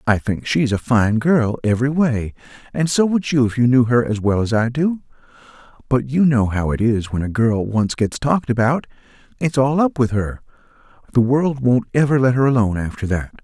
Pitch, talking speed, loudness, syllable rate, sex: 125 Hz, 210 wpm, -18 LUFS, 5.3 syllables/s, male